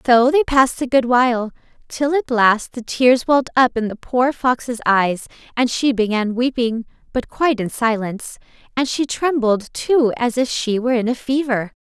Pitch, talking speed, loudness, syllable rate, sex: 245 Hz, 190 wpm, -18 LUFS, 4.3 syllables/s, female